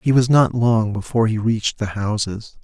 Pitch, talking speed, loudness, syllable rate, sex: 110 Hz, 205 wpm, -19 LUFS, 5.2 syllables/s, male